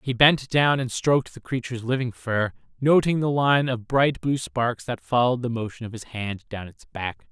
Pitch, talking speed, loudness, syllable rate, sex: 125 Hz, 215 wpm, -23 LUFS, 5.0 syllables/s, male